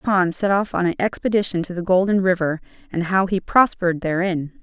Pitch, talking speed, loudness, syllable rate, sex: 185 Hz, 195 wpm, -20 LUFS, 5.4 syllables/s, female